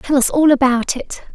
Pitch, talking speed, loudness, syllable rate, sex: 270 Hz, 225 wpm, -15 LUFS, 4.9 syllables/s, female